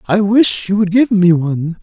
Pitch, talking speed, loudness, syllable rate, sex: 195 Hz, 230 wpm, -13 LUFS, 4.7 syllables/s, male